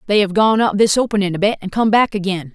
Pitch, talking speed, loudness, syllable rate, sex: 205 Hz, 285 wpm, -16 LUFS, 6.4 syllables/s, female